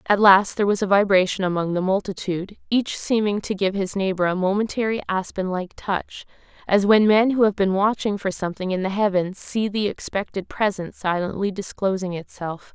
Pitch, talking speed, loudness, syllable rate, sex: 195 Hz, 185 wpm, -22 LUFS, 5.4 syllables/s, female